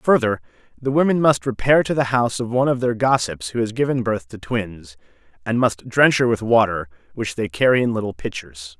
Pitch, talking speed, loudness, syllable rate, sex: 115 Hz, 210 wpm, -20 LUFS, 5.5 syllables/s, male